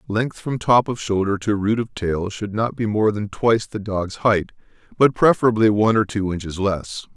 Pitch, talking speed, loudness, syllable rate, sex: 105 Hz, 210 wpm, -20 LUFS, 5.0 syllables/s, male